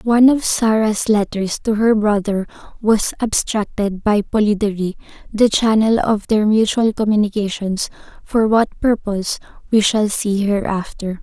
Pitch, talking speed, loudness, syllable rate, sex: 210 Hz, 130 wpm, -17 LUFS, 4.4 syllables/s, female